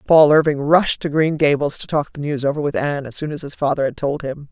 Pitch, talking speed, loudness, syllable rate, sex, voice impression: 145 Hz, 280 wpm, -18 LUFS, 6.0 syllables/s, female, feminine, very adult-like, slightly intellectual, calm, slightly friendly, slightly elegant